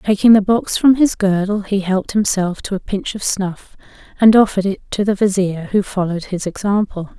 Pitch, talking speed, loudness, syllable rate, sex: 200 Hz, 200 wpm, -16 LUFS, 5.4 syllables/s, female